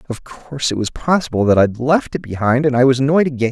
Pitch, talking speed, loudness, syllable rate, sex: 130 Hz, 255 wpm, -16 LUFS, 6.3 syllables/s, male